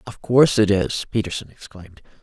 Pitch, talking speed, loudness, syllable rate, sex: 110 Hz, 160 wpm, -19 LUFS, 6.0 syllables/s, female